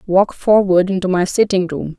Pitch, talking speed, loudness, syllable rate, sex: 185 Hz, 180 wpm, -15 LUFS, 4.9 syllables/s, female